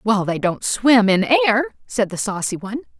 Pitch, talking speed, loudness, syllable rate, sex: 215 Hz, 200 wpm, -18 LUFS, 5.5 syllables/s, female